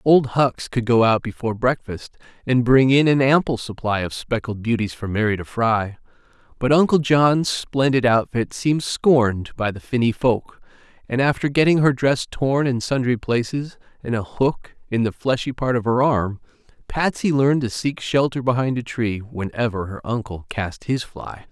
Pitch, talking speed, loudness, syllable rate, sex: 120 Hz, 180 wpm, -20 LUFS, 4.8 syllables/s, male